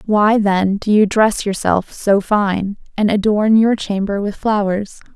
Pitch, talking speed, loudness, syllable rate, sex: 205 Hz, 165 wpm, -16 LUFS, 3.8 syllables/s, female